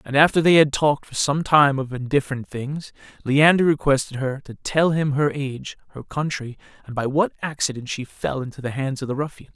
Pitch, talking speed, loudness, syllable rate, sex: 140 Hz, 205 wpm, -21 LUFS, 5.5 syllables/s, male